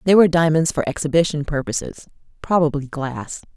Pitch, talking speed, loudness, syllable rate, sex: 155 Hz, 135 wpm, -19 LUFS, 5.7 syllables/s, female